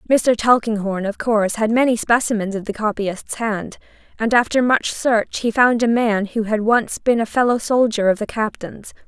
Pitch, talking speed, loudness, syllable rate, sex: 225 Hz, 190 wpm, -18 LUFS, 4.8 syllables/s, female